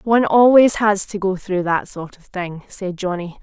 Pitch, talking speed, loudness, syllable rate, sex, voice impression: 195 Hz, 210 wpm, -17 LUFS, 4.6 syllables/s, female, very feminine, slightly young, slightly adult-like, very thin, slightly tensed, slightly weak, very bright, hard, very clear, very fluent, cute, intellectual, refreshing, very sincere, very calm, friendly, very reassuring, very unique, very elegant, slightly wild, very sweet, lively, very kind, very modest